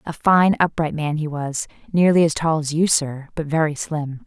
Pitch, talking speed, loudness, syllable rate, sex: 155 Hz, 210 wpm, -20 LUFS, 4.7 syllables/s, female